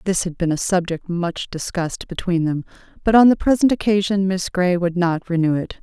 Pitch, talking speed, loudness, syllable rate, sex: 180 Hz, 205 wpm, -19 LUFS, 5.3 syllables/s, female